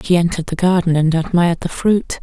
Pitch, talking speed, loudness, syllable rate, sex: 170 Hz, 215 wpm, -16 LUFS, 6.1 syllables/s, female